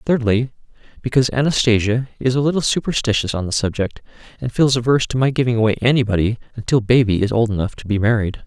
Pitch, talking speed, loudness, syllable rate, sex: 120 Hz, 185 wpm, -18 LUFS, 6.7 syllables/s, male